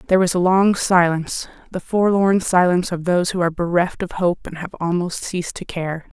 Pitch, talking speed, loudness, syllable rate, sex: 180 Hz, 205 wpm, -19 LUFS, 5.7 syllables/s, female